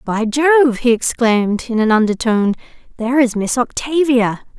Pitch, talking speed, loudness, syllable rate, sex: 240 Hz, 145 wpm, -15 LUFS, 5.0 syllables/s, female